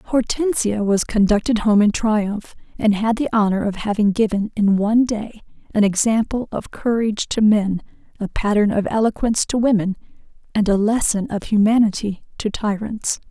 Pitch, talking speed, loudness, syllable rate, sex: 215 Hz, 160 wpm, -19 LUFS, 5.0 syllables/s, female